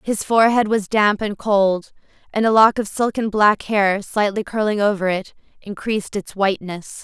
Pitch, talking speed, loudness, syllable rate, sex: 205 Hz, 170 wpm, -18 LUFS, 4.8 syllables/s, female